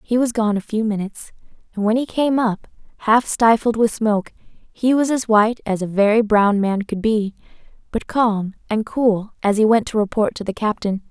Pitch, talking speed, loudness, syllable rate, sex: 220 Hz, 205 wpm, -19 LUFS, 5.0 syllables/s, female